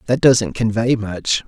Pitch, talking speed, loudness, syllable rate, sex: 110 Hz, 165 wpm, -17 LUFS, 3.8 syllables/s, male